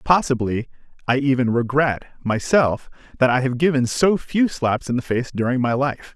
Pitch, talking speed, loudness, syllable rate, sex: 130 Hz, 175 wpm, -20 LUFS, 4.9 syllables/s, male